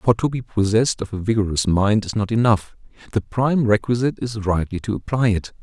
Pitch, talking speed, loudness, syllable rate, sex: 110 Hz, 205 wpm, -20 LUFS, 5.9 syllables/s, male